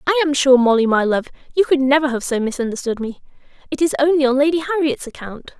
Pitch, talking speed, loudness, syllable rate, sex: 280 Hz, 215 wpm, -17 LUFS, 6.2 syllables/s, female